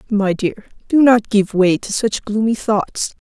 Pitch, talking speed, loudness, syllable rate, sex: 210 Hz, 185 wpm, -16 LUFS, 4.1 syllables/s, female